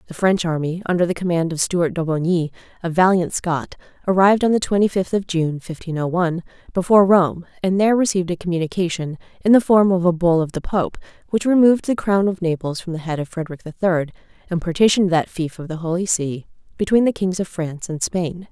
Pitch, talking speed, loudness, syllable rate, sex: 180 Hz, 215 wpm, -19 LUFS, 6.1 syllables/s, female